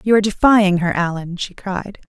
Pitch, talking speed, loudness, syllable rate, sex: 195 Hz, 200 wpm, -17 LUFS, 5.2 syllables/s, female